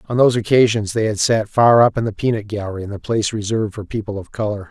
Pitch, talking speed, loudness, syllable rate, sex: 110 Hz, 255 wpm, -18 LUFS, 6.8 syllables/s, male